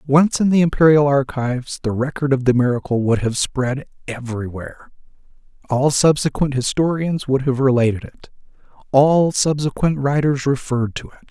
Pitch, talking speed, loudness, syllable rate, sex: 135 Hz, 145 wpm, -18 LUFS, 5.2 syllables/s, male